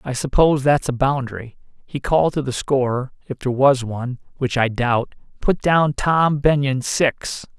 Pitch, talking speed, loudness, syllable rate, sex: 135 Hz, 160 wpm, -19 LUFS, 4.8 syllables/s, male